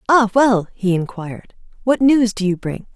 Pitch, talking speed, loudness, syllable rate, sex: 215 Hz, 180 wpm, -17 LUFS, 4.7 syllables/s, female